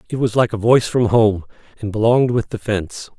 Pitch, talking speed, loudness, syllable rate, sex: 110 Hz, 225 wpm, -17 LUFS, 6.2 syllables/s, male